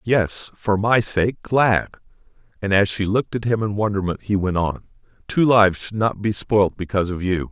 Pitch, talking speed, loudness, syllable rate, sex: 100 Hz, 200 wpm, -20 LUFS, 5.0 syllables/s, male